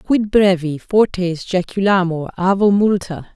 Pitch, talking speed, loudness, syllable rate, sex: 185 Hz, 105 wpm, -16 LUFS, 4.0 syllables/s, female